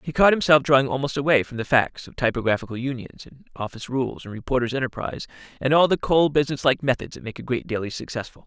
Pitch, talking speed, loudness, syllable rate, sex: 130 Hz, 215 wpm, -22 LUFS, 6.8 syllables/s, male